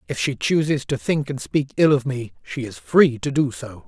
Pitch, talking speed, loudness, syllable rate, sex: 135 Hz, 245 wpm, -21 LUFS, 4.8 syllables/s, male